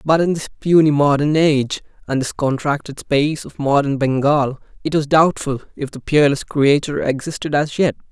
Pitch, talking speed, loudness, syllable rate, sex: 145 Hz, 170 wpm, -18 LUFS, 5.2 syllables/s, male